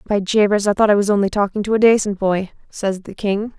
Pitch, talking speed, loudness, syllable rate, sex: 205 Hz, 250 wpm, -17 LUFS, 5.9 syllables/s, female